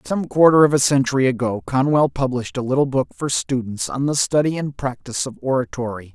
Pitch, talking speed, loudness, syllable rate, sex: 135 Hz, 195 wpm, -19 LUFS, 5.8 syllables/s, male